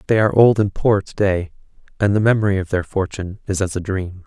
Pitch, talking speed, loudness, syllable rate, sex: 95 Hz, 240 wpm, -18 LUFS, 6.2 syllables/s, male